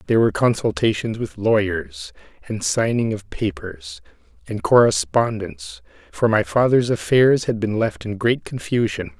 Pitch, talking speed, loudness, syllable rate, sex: 115 Hz, 135 wpm, -20 LUFS, 4.7 syllables/s, male